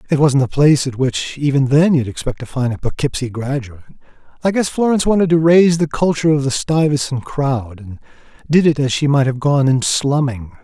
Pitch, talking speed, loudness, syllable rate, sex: 140 Hz, 210 wpm, -16 LUFS, 5.9 syllables/s, male